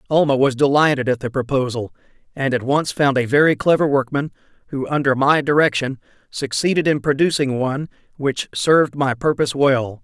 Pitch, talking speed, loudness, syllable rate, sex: 135 Hz, 160 wpm, -18 LUFS, 5.5 syllables/s, male